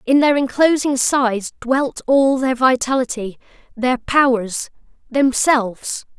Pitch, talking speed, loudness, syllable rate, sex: 255 Hz, 85 wpm, -17 LUFS, 4.0 syllables/s, female